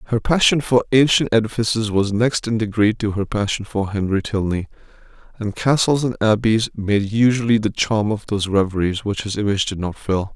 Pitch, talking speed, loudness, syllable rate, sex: 110 Hz, 180 wpm, -19 LUFS, 5.3 syllables/s, male